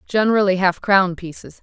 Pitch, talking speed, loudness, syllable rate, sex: 190 Hz, 150 wpm, -17 LUFS, 5.6 syllables/s, female